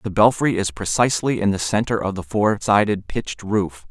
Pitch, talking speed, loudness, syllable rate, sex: 105 Hz, 200 wpm, -20 LUFS, 5.2 syllables/s, male